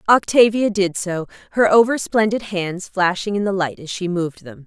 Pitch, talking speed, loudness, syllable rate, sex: 190 Hz, 195 wpm, -19 LUFS, 5.0 syllables/s, female